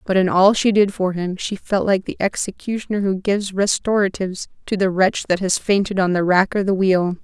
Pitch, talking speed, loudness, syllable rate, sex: 190 Hz, 225 wpm, -19 LUFS, 5.4 syllables/s, female